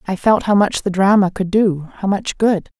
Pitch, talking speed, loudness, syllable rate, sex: 195 Hz, 215 wpm, -16 LUFS, 4.9 syllables/s, female